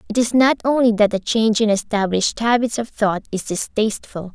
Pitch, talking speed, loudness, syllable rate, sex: 220 Hz, 195 wpm, -18 LUFS, 5.7 syllables/s, female